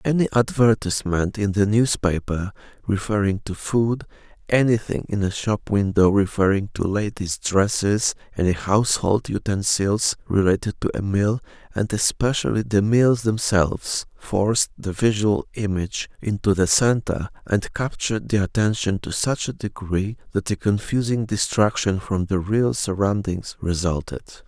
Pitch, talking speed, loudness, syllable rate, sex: 105 Hz, 130 wpm, -22 LUFS, 4.6 syllables/s, male